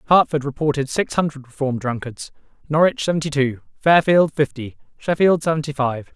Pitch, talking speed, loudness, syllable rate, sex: 145 Hz, 135 wpm, -20 LUFS, 5.6 syllables/s, male